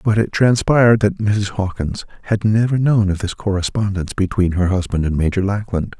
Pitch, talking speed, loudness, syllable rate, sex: 100 Hz, 180 wpm, -17 LUFS, 5.3 syllables/s, male